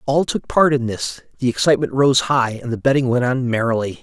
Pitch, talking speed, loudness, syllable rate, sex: 125 Hz, 225 wpm, -18 LUFS, 5.7 syllables/s, male